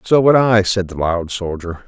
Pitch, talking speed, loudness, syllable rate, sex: 100 Hz, 225 wpm, -16 LUFS, 4.5 syllables/s, male